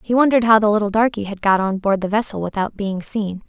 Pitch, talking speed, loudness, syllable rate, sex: 205 Hz, 260 wpm, -18 LUFS, 6.3 syllables/s, female